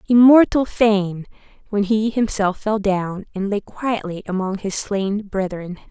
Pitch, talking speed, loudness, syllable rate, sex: 205 Hz, 140 wpm, -19 LUFS, 4.0 syllables/s, female